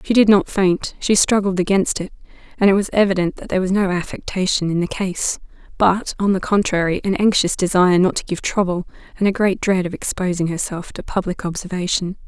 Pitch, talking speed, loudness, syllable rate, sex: 190 Hz, 200 wpm, -19 LUFS, 5.7 syllables/s, female